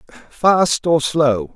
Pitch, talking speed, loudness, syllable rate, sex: 150 Hz, 115 wpm, -16 LUFS, 3.2 syllables/s, male